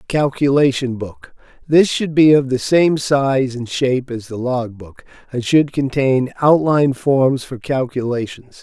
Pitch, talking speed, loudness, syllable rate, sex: 135 Hz, 145 wpm, -16 LUFS, 4.1 syllables/s, male